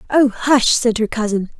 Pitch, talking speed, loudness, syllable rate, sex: 235 Hz, 190 wpm, -16 LUFS, 4.6 syllables/s, female